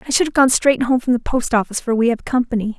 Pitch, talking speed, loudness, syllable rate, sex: 245 Hz, 300 wpm, -17 LUFS, 6.8 syllables/s, female